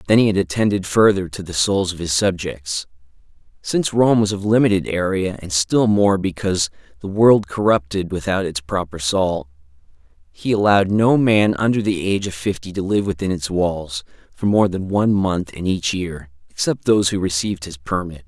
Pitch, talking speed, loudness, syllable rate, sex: 95 Hz, 185 wpm, -19 LUFS, 5.2 syllables/s, male